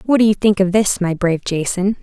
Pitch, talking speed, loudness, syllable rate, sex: 195 Hz, 265 wpm, -16 LUFS, 5.9 syllables/s, female